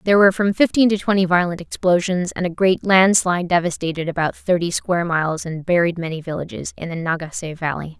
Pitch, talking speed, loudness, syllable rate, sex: 175 Hz, 190 wpm, -19 LUFS, 6.1 syllables/s, female